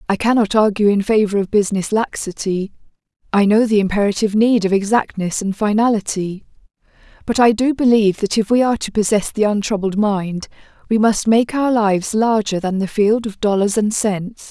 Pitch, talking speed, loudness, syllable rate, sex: 210 Hz, 170 wpm, -17 LUFS, 5.4 syllables/s, female